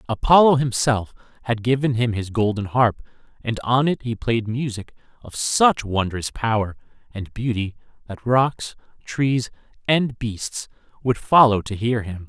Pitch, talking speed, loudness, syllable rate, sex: 115 Hz, 145 wpm, -21 LUFS, 4.3 syllables/s, male